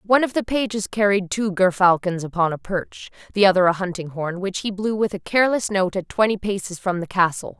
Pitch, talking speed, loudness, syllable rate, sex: 195 Hz, 220 wpm, -21 LUFS, 5.7 syllables/s, female